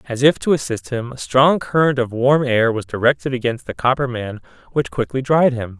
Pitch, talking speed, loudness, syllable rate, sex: 125 Hz, 220 wpm, -18 LUFS, 5.3 syllables/s, male